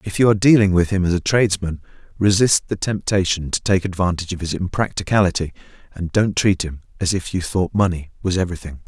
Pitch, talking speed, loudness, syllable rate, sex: 95 Hz, 195 wpm, -19 LUFS, 6.3 syllables/s, male